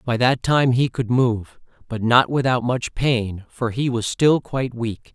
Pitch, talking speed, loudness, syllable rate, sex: 120 Hz, 210 wpm, -20 LUFS, 4.0 syllables/s, male